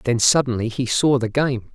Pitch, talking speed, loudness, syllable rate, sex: 125 Hz, 205 wpm, -19 LUFS, 4.7 syllables/s, male